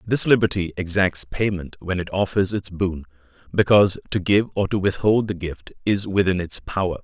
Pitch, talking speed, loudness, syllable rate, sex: 95 Hz, 180 wpm, -21 LUFS, 5.0 syllables/s, male